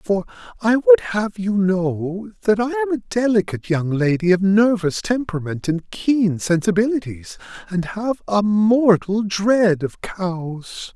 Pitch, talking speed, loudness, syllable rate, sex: 200 Hz, 140 wpm, -19 LUFS, 3.9 syllables/s, male